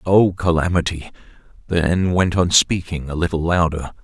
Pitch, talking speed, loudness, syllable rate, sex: 85 Hz, 135 wpm, -18 LUFS, 4.6 syllables/s, male